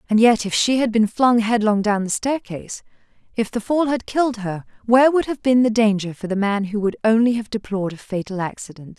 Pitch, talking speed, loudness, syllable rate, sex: 220 Hz, 225 wpm, -19 LUFS, 5.7 syllables/s, female